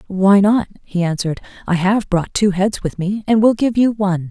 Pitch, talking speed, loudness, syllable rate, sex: 200 Hz, 225 wpm, -16 LUFS, 5.1 syllables/s, female